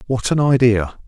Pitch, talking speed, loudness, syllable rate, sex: 120 Hz, 165 wpm, -16 LUFS, 4.6 syllables/s, male